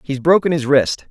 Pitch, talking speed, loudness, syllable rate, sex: 145 Hz, 215 wpm, -15 LUFS, 5.1 syllables/s, male